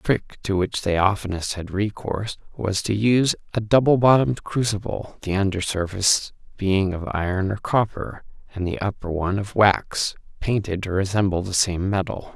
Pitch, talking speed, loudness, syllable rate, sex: 100 Hz, 170 wpm, -22 LUFS, 5.1 syllables/s, male